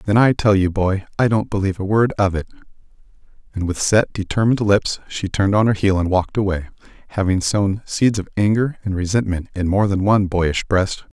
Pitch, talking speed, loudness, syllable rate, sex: 100 Hz, 205 wpm, -19 LUFS, 5.7 syllables/s, male